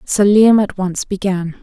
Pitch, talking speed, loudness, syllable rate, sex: 195 Hz, 150 wpm, -14 LUFS, 4.1 syllables/s, female